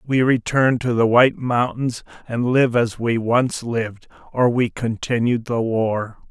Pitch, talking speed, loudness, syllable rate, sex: 120 Hz, 160 wpm, -19 LUFS, 4.1 syllables/s, male